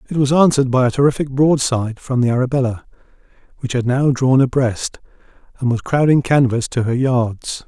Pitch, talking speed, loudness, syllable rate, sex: 130 Hz, 170 wpm, -17 LUFS, 5.5 syllables/s, male